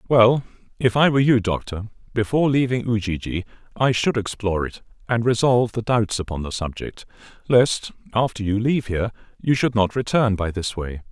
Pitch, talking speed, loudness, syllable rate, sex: 110 Hz, 175 wpm, -21 LUFS, 5.6 syllables/s, male